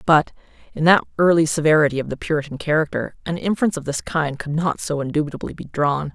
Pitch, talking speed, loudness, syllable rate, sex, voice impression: 155 Hz, 195 wpm, -20 LUFS, 6.5 syllables/s, female, feminine, very adult-like, slightly fluent, intellectual, slightly strict